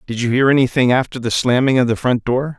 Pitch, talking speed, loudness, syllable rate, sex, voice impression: 125 Hz, 255 wpm, -16 LUFS, 6.1 syllables/s, male, masculine, adult-like, tensed, clear, fluent, intellectual, calm, wild, strict